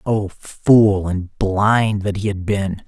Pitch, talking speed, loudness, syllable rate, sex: 100 Hz, 165 wpm, -18 LUFS, 3.0 syllables/s, male